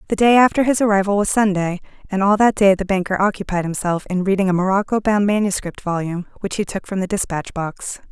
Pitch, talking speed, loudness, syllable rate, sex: 195 Hz, 215 wpm, -18 LUFS, 6.1 syllables/s, female